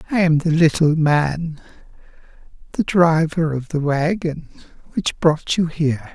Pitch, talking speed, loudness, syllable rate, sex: 160 Hz, 135 wpm, -19 LUFS, 4.2 syllables/s, male